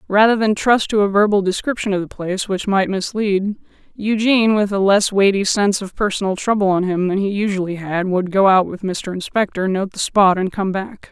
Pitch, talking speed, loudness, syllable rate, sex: 200 Hz, 215 wpm, -17 LUFS, 3.8 syllables/s, female